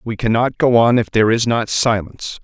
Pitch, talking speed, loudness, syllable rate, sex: 115 Hz, 220 wpm, -16 LUFS, 5.6 syllables/s, male